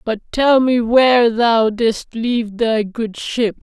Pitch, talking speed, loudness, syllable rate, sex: 230 Hz, 160 wpm, -16 LUFS, 3.5 syllables/s, female